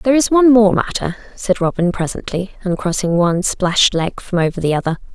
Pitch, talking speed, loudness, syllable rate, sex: 190 Hz, 185 wpm, -16 LUFS, 5.9 syllables/s, female